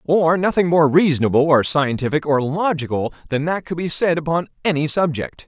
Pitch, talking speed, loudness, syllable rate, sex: 155 Hz, 175 wpm, -18 LUFS, 5.4 syllables/s, male